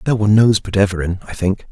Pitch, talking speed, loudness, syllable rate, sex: 100 Hz, 245 wpm, -16 LUFS, 6.6 syllables/s, male